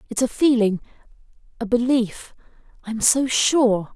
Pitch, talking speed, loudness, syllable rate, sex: 235 Hz, 105 wpm, -20 LUFS, 4.5 syllables/s, female